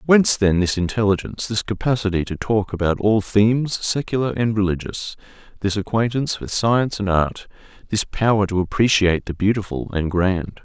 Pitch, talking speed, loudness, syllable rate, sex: 105 Hz, 140 wpm, -20 LUFS, 5.5 syllables/s, male